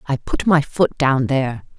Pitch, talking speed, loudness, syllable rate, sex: 135 Hz, 200 wpm, -18 LUFS, 4.5 syllables/s, female